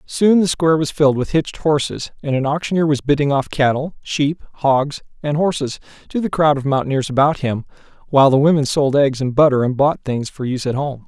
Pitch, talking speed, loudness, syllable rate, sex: 145 Hz, 215 wpm, -17 LUFS, 5.8 syllables/s, male